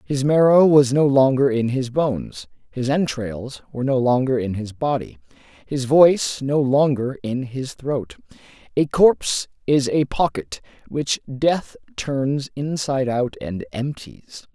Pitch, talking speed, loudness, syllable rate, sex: 130 Hz, 145 wpm, -20 LUFS, 4.1 syllables/s, male